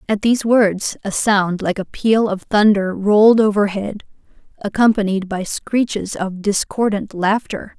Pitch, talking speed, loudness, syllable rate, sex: 205 Hz, 145 wpm, -17 LUFS, 4.3 syllables/s, female